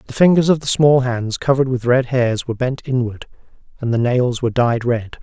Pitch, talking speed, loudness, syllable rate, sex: 125 Hz, 220 wpm, -17 LUFS, 5.5 syllables/s, male